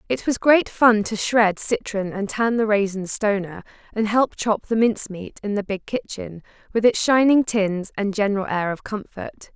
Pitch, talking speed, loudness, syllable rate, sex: 210 Hz, 195 wpm, -21 LUFS, 4.7 syllables/s, female